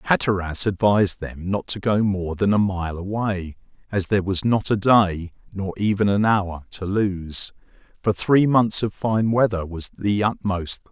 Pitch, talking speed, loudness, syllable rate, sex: 100 Hz, 180 wpm, -21 LUFS, 4.4 syllables/s, male